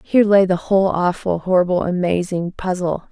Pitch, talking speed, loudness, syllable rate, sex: 185 Hz, 155 wpm, -18 LUFS, 5.4 syllables/s, female